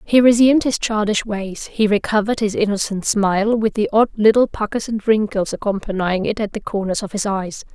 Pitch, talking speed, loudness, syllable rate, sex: 210 Hz, 195 wpm, -18 LUFS, 5.4 syllables/s, female